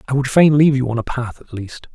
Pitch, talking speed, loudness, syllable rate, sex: 130 Hz, 310 wpm, -16 LUFS, 6.3 syllables/s, male